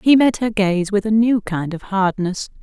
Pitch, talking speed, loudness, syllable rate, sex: 205 Hz, 230 wpm, -18 LUFS, 4.4 syllables/s, female